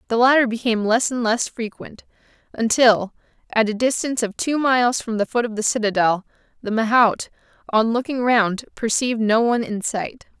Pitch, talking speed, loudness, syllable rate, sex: 230 Hz, 175 wpm, -20 LUFS, 5.4 syllables/s, female